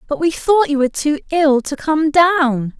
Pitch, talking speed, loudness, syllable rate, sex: 300 Hz, 215 wpm, -15 LUFS, 4.4 syllables/s, female